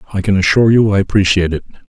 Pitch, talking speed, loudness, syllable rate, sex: 95 Hz, 220 wpm, -13 LUFS, 8.6 syllables/s, male